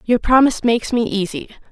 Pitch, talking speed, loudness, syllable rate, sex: 230 Hz, 175 wpm, -17 LUFS, 6.3 syllables/s, female